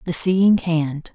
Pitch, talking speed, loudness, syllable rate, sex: 170 Hz, 155 wpm, -18 LUFS, 3.0 syllables/s, female